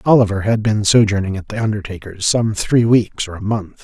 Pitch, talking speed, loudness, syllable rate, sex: 105 Hz, 205 wpm, -17 LUFS, 5.4 syllables/s, male